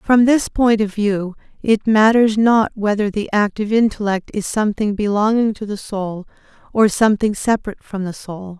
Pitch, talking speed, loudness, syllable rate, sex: 210 Hz, 170 wpm, -17 LUFS, 5.0 syllables/s, female